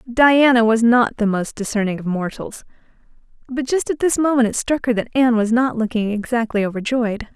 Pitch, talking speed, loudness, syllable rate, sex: 235 Hz, 190 wpm, -18 LUFS, 5.4 syllables/s, female